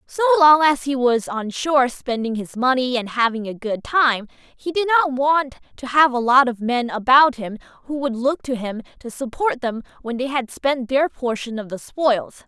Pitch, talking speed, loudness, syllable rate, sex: 260 Hz, 210 wpm, -19 LUFS, 4.6 syllables/s, female